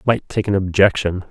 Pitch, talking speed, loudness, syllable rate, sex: 95 Hz, 185 wpm, -18 LUFS, 5.3 syllables/s, male